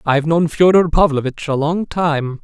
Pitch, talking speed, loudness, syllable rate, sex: 155 Hz, 170 wpm, -16 LUFS, 4.8 syllables/s, male